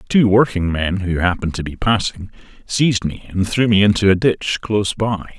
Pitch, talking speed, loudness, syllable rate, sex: 100 Hz, 200 wpm, -17 LUFS, 5.2 syllables/s, male